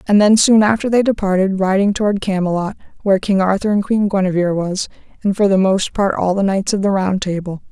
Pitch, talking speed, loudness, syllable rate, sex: 195 Hz, 220 wpm, -16 LUFS, 5.8 syllables/s, female